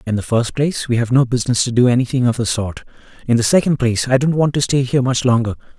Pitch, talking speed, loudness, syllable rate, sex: 125 Hz, 270 wpm, -16 LUFS, 7.0 syllables/s, male